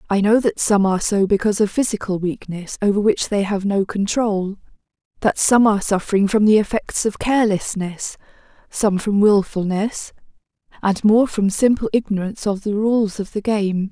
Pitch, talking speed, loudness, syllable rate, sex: 205 Hz, 170 wpm, -19 LUFS, 5.1 syllables/s, female